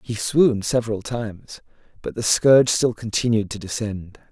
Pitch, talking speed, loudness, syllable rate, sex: 110 Hz, 155 wpm, -20 LUFS, 5.0 syllables/s, male